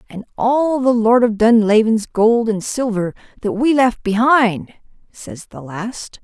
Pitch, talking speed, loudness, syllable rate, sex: 225 Hz, 155 wpm, -16 LUFS, 3.8 syllables/s, female